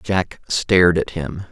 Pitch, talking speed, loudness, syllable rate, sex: 85 Hz, 160 wpm, -18 LUFS, 3.7 syllables/s, male